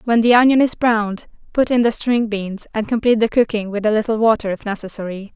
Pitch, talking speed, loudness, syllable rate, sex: 220 Hz, 225 wpm, -18 LUFS, 6.1 syllables/s, female